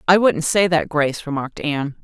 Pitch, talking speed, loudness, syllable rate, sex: 160 Hz, 205 wpm, -19 LUFS, 6.0 syllables/s, female